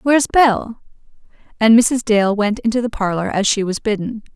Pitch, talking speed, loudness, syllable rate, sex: 220 Hz, 180 wpm, -16 LUFS, 5.0 syllables/s, female